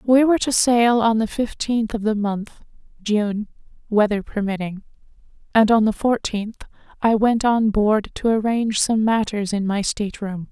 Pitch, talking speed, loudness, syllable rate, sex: 220 Hz, 165 wpm, -20 LUFS, 4.8 syllables/s, female